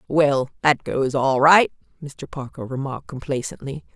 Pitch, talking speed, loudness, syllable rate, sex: 130 Hz, 135 wpm, -20 LUFS, 4.6 syllables/s, female